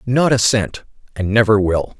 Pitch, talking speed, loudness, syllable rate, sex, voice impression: 110 Hz, 180 wpm, -16 LUFS, 4.5 syllables/s, male, masculine, adult-like, slightly thick, fluent, cool, intellectual, sincere, calm, elegant, slightly sweet